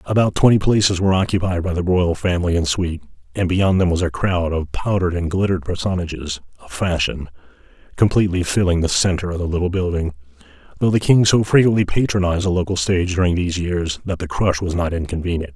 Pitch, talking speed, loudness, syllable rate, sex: 90 Hz, 195 wpm, -19 LUFS, 6.3 syllables/s, male